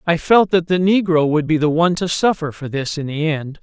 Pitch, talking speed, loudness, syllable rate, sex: 165 Hz, 265 wpm, -17 LUFS, 5.5 syllables/s, male